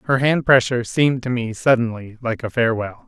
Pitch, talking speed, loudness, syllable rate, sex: 120 Hz, 195 wpm, -19 LUFS, 5.9 syllables/s, male